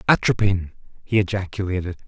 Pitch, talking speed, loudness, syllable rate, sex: 95 Hz, 85 wpm, -22 LUFS, 6.0 syllables/s, male